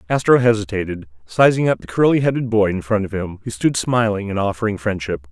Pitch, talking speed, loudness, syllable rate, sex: 105 Hz, 205 wpm, -18 LUFS, 6.0 syllables/s, male